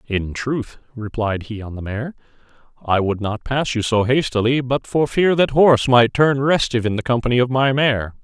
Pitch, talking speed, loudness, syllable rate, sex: 120 Hz, 205 wpm, -18 LUFS, 5.0 syllables/s, male